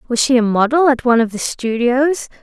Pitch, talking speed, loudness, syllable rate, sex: 250 Hz, 220 wpm, -15 LUFS, 5.6 syllables/s, female